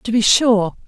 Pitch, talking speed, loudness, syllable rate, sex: 220 Hz, 205 wpm, -15 LUFS, 4.0 syllables/s, female